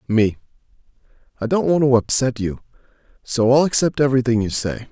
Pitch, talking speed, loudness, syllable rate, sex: 125 Hz, 160 wpm, -18 LUFS, 5.7 syllables/s, male